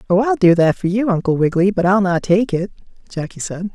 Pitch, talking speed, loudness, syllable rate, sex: 185 Hz, 240 wpm, -17 LUFS, 6.0 syllables/s, male